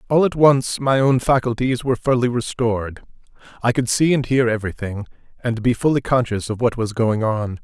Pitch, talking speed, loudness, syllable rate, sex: 120 Hz, 190 wpm, -19 LUFS, 5.4 syllables/s, male